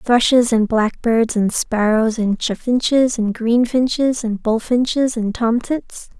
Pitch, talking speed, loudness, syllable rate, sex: 235 Hz, 125 wpm, -17 LUFS, 3.8 syllables/s, female